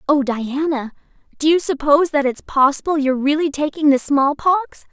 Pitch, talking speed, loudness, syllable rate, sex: 290 Hz, 160 wpm, -18 LUFS, 5.2 syllables/s, female